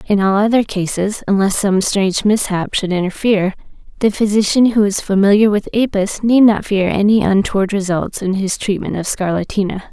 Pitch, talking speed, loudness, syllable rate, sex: 200 Hz, 170 wpm, -15 LUFS, 5.4 syllables/s, female